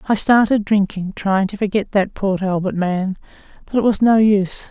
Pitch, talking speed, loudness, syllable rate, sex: 200 Hz, 190 wpm, -17 LUFS, 5.0 syllables/s, female